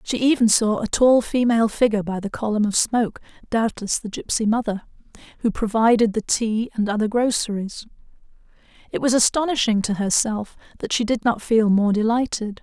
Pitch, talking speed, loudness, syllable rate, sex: 225 Hz, 165 wpm, -20 LUFS, 5.4 syllables/s, female